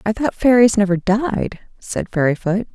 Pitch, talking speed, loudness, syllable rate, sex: 210 Hz, 155 wpm, -17 LUFS, 4.6 syllables/s, female